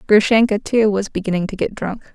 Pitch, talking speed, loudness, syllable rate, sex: 205 Hz, 195 wpm, -18 LUFS, 5.5 syllables/s, female